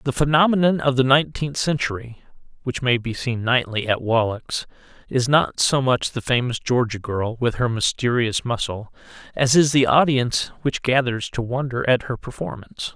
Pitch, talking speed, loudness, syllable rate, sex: 125 Hz, 165 wpm, -21 LUFS, 5.0 syllables/s, male